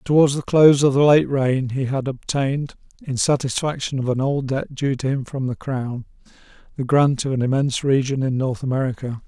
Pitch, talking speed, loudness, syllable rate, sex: 135 Hz, 200 wpm, -20 LUFS, 5.4 syllables/s, male